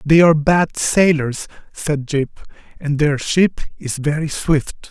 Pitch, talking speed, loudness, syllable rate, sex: 150 Hz, 145 wpm, -17 LUFS, 3.7 syllables/s, male